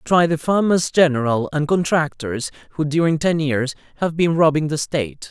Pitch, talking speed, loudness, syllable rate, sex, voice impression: 155 Hz, 170 wpm, -19 LUFS, 4.9 syllables/s, male, masculine, slightly middle-aged, slightly thick, slightly mature, elegant